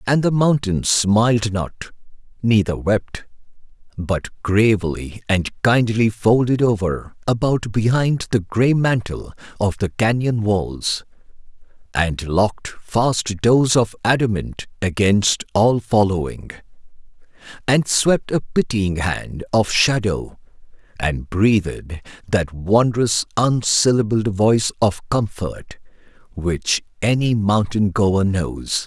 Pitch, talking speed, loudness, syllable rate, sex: 105 Hz, 105 wpm, -19 LUFS, 3.5 syllables/s, male